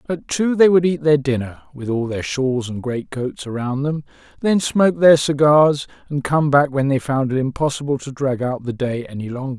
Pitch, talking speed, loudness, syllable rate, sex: 140 Hz, 200 wpm, -19 LUFS, 5.0 syllables/s, male